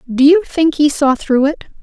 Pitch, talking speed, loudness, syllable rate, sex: 295 Hz, 230 wpm, -13 LUFS, 4.6 syllables/s, female